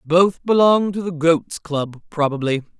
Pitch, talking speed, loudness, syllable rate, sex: 170 Hz, 150 wpm, -19 LUFS, 4.0 syllables/s, female